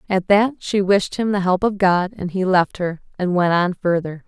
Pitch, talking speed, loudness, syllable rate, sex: 190 Hz, 240 wpm, -19 LUFS, 4.7 syllables/s, female